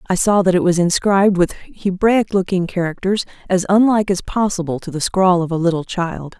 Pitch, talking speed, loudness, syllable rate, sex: 185 Hz, 195 wpm, -17 LUFS, 5.3 syllables/s, female